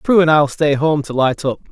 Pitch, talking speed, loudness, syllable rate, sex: 150 Hz, 280 wpm, -15 LUFS, 5.1 syllables/s, male